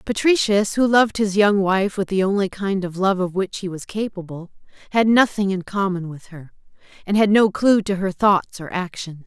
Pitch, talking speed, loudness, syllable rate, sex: 195 Hz, 205 wpm, -19 LUFS, 5.0 syllables/s, female